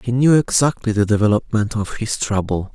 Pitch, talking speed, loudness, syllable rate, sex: 110 Hz, 175 wpm, -18 LUFS, 5.3 syllables/s, male